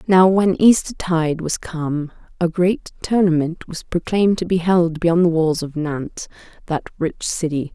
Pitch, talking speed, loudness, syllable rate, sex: 170 Hz, 165 wpm, -19 LUFS, 4.5 syllables/s, female